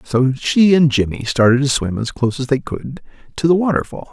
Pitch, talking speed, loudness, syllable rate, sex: 135 Hz, 220 wpm, -16 LUFS, 5.5 syllables/s, male